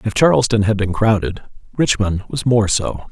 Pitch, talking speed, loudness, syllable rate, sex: 110 Hz, 175 wpm, -17 LUFS, 5.1 syllables/s, male